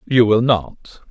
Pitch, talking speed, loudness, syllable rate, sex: 115 Hz, 165 wpm, -16 LUFS, 3.3 syllables/s, male